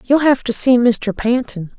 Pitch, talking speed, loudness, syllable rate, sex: 240 Hz, 200 wpm, -15 LUFS, 4.2 syllables/s, female